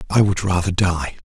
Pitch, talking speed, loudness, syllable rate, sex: 90 Hz, 190 wpm, -19 LUFS, 5.0 syllables/s, male